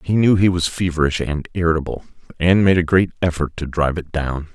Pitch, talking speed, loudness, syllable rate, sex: 85 Hz, 210 wpm, -18 LUFS, 5.9 syllables/s, male